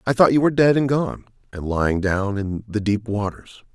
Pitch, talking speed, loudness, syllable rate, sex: 110 Hz, 225 wpm, -20 LUFS, 5.3 syllables/s, male